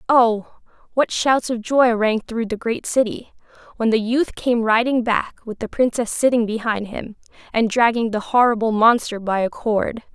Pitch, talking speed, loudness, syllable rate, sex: 230 Hz, 175 wpm, -19 LUFS, 4.5 syllables/s, female